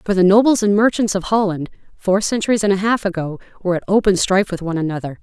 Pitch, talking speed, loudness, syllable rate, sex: 195 Hz, 230 wpm, -17 LUFS, 6.9 syllables/s, female